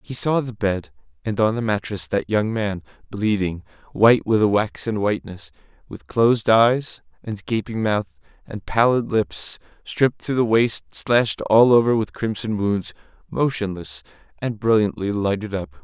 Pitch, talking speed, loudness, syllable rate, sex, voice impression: 110 Hz, 155 wpm, -21 LUFS, 4.6 syllables/s, male, very masculine, middle-aged, very thick, tensed, powerful, bright, soft, very clear, fluent, slightly raspy, cool, very intellectual, refreshing, sincere, calm, slightly mature, friendly, reassuring, unique, slightly elegant, wild, slightly sweet, lively, kind, modest